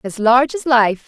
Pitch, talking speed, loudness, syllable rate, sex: 240 Hz, 225 wpm, -15 LUFS, 5.2 syllables/s, female